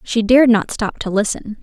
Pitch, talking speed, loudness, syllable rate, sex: 220 Hz, 220 wpm, -16 LUFS, 5.2 syllables/s, female